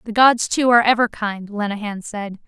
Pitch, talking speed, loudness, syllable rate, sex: 220 Hz, 195 wpm, -18 LUFS, 5.3 syllables/s, female